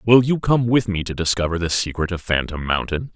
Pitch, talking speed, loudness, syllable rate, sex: 95 Hz, 230 wpm, -20 LUFS, 5.5 syllables/s, male